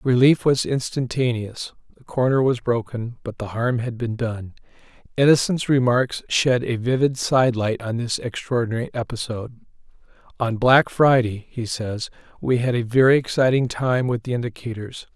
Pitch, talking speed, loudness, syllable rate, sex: 120 Hz, 150 wpm, -21 LUFS, 4.9 syllables/s, male